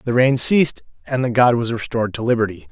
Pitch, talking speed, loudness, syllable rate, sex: 120 Hz, 220 wpm, -18 LUFS, 6.4 syllables/s, male